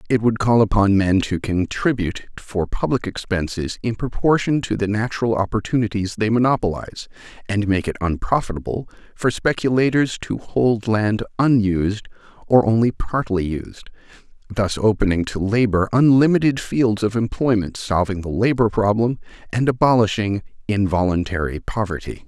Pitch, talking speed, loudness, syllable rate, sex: 110 Hz, 130 wpm, -20 LUFS, 5.2 syllables/s, male